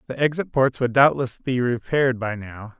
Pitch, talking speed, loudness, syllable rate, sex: 125 Hz, 195 wpm, -21 LUFS, 5.0 syllables/s, male